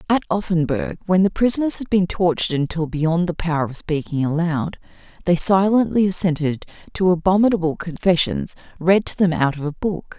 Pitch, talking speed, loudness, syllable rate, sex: 175 Hz, 165 wpm, -19 LUFS, 5.4 syllables/s, female